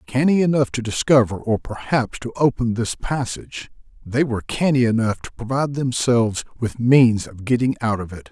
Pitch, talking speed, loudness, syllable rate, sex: 120 Hz, 175 wpm, -20 LUFS, 5.3 syllables/s, male